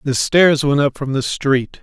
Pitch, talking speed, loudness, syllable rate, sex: 140 Hz, 230 wpm, -16 LUFS, 4.1 syllables/s, male